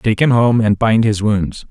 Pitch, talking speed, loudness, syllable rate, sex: 110 Hz, 245 wpm, -14 LUFS, 4.2 syllables/s, male